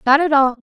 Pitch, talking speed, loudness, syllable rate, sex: 275 Hz, 285 wpm, -14 LUFS, 6.3 syllables/s, female